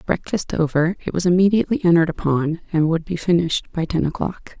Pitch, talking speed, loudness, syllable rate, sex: 170 Hz, 185 wpm, -20 LUFS, 6.1 syllables/s, female